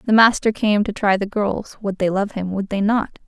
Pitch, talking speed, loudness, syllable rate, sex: 205 Hz, 255 wpm, -19 LUFS, 4.9 syllables/s, female